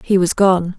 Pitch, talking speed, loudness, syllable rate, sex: 185 Hz, 230 wpm, -15 LUFS, 4.4 syllables/s, female